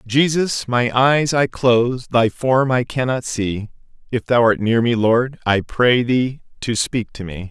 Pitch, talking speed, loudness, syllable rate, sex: 120 Hz, 185 wpm, -18 LUFS, 3.9 syllables/s, male